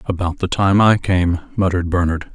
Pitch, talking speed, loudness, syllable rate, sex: 90 Hz, 180 wpm, -17 LUFS, 5.3 syllables/s, male